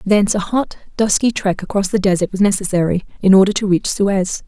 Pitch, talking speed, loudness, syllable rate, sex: 195 Hz, 200 wpm, -16 LUFS, 5.8 syllables/s, female